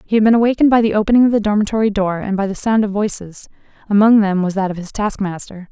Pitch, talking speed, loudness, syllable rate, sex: 205 Hz, 240 wpm, -16 LUFS, 6.9 syllables/s, female